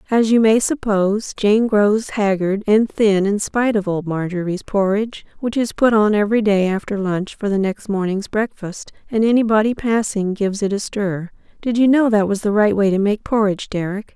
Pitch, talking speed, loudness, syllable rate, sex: 210 Hz, 195 wpm, -18 LUFS, 5.1 syllables/s, female